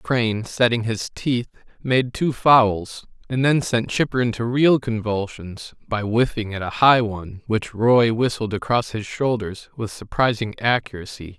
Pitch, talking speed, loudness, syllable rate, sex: 115 Hz, 155 wpm, -21 LUFS, 4.3 syllables/s, male